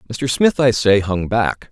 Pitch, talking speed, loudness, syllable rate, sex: 115 Hz, 210 wpm, -16 LUFS, 4.1 syllables/s, male